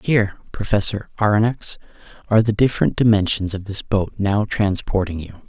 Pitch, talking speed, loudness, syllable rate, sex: 105 Hz, 140 wpm, -20 LUFS, 5.4 syllables/s, male